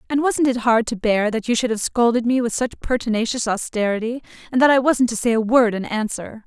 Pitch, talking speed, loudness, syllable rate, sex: 235 Hz, 240 wpm, -19 LUFS, 5.8 syllables/s, female